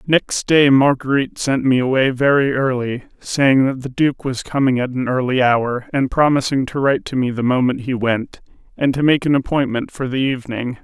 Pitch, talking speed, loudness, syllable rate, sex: 130 Hz, 200 wpm, -17 LUFS, 5.1 syllables/s, male